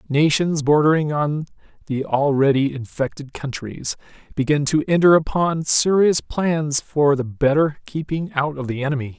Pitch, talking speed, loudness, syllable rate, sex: 145 Hz, 135 wpm, -20 LUFS, 4.6 syllables/s, male